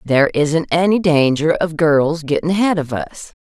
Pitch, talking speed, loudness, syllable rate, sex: 160 Hz, 175 wpm, -16 LUFS, 4.8 syllables/s, female